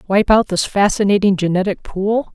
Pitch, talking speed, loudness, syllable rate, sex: 200 Hz, 155 wpm, -16 LUFS, 5.2 syllables/s, female